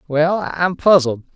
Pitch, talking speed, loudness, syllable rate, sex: 160 Hz, 135 wpm, -16 LUFS, 3.7 syllables/s, male